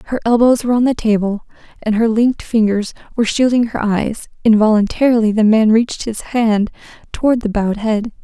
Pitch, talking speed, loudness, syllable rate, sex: 225 Hz, 175 wpm, -15 LUFS, 5.8 syllables/s, female